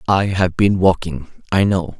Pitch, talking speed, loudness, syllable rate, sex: 90 Hz, 180 wpm, -17 LUFS, 4.3 syllables/s, male